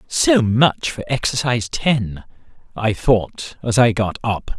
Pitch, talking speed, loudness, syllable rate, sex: 120 Hz, 145 wpm, -18 LUFS, 3.7 syllables/s, male